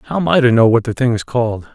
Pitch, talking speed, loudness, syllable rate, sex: 120 Hz, 310 wpm, -15 LUFS, 5.9 syllables/s, male